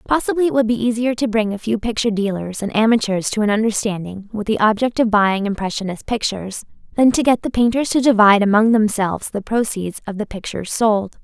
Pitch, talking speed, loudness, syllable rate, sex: 215 Hz, 205 wpm, -18 LUFS, 6.0 syllables/s, female